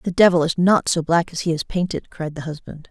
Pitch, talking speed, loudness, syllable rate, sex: 165 Hz, 270 wpm, -20 LUFS, 5.7 syllables/s, female